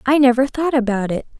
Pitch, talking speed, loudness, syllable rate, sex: 255 Hz, 215 wpm, -17 LUFS, 6.0 syllables/s, female